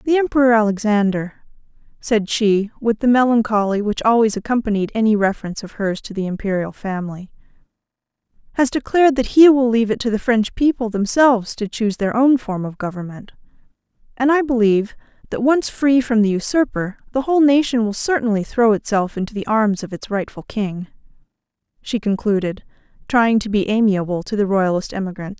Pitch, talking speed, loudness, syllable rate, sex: 220 Hz, 170 wpm, -18 LUFS, 5.7 syllables/s, female